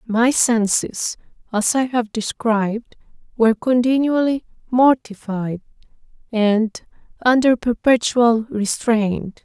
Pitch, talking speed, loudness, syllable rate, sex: 230 Hz, 85 wpm, -18 LUFS, 3.2 syllables/s, female